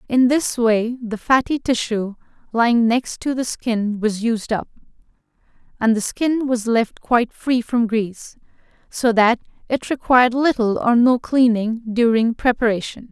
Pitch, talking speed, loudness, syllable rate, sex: 235 Hz, 150 wpm, -19 LUFS, 4.3 syllables/s, female